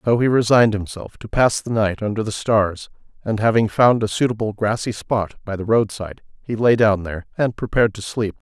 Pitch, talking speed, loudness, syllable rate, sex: 110 Hz, 205 wpm, -19 LUFS, 5.6 syllables/s, male